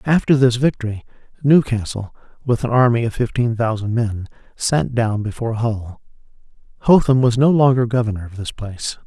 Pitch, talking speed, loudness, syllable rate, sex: 120 Hz, 150 wpm, -18 LUFS, 5.4 syllables/s, male